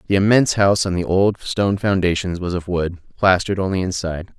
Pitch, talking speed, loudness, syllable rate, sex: 95 Hz, 190 wpm, -19 LUFS, 6.4 syllables/s, male